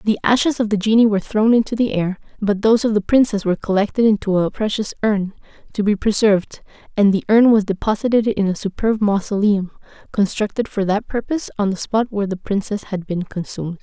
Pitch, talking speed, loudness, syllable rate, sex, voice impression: 210 Hz, 200 wpm, -18 LUFS, 6.0 syllables/s, female, very feminine, slightly young, slightly adult-like, very thin, slightly tensed, slightly weak, slightly bright, slightly soft, clear, fluent, cute, slightly intellectual, slightly refreshing, sincere, calm, friendly, reassuring, slightly unique, elegant, sweet, kind, slightly modest